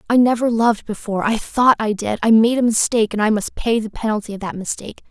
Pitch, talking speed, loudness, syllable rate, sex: 220 Hz, 235 wpm, -18 LUFS, 6.5 syllables/s, female